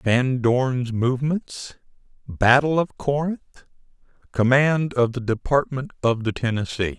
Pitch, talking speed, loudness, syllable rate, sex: 130 Hz, 95 wpm, -21 LUFS, 4.0 syllables/s, male